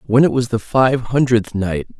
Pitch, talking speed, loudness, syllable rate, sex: 120 Hz, 210 wpm, -17 LUFS, 4.6 syllables/s, male